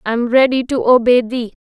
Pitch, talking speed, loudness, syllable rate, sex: 250 Hz, 220 wpm, -14 LUFS, 5.5 syllables/s, female